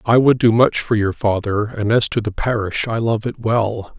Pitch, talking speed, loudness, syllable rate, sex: 110 Hz, 240 wpm, -18 LUFS, 4.7 syllables/s, male